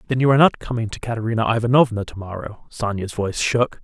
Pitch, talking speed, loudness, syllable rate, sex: 115 Hz, 205 wpm, -20 LUFS, 6.7 syllables/s, male